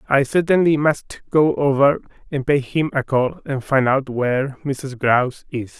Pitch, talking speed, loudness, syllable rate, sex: 135 Hz, 175 wpm, -19 LUFS, 4.3 syllables/s, male